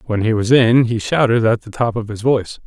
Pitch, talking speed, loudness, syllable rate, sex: 115 Hz, 270 wpm, -16 LUFS, 5.6 syllables/s, male